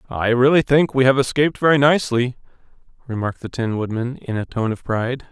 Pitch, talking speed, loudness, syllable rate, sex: 125 Hz, 190 wpm, -19 LUFS, 6.1 syllables/s, male